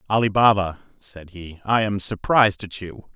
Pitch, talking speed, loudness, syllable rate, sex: 100 Hz, 170 wpm, -20 LUFS, 4.8 syllables/s, male